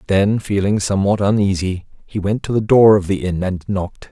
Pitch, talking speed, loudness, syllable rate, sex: 100 Hz, 205 wpm, -17 LUFS, 5.4 syllables/s, male